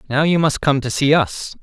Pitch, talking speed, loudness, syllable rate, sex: 140 Hz, 260 wpm, -17 LUFS, 5.1 syllables/s, male